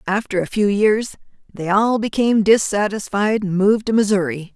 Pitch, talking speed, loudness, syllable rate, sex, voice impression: 205 Hz, 160 wpm, -18 LUFS, 5.2 syllables/s, female, feminine, adult-like, tensed, powerful, slightly hard, clear, slightly raspy, intellectual, calm, elegant, lively, slightly strict, slightly sharp